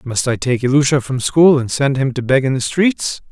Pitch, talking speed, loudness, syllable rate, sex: 135 Hz, 255 wpm, -15 LUFS, 5.1 syllables/s, male